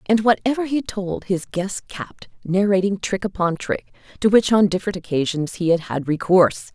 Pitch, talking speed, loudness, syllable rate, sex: 190 Hz, 180 wpm, -20 LUFS, 5.3 syllables/s, female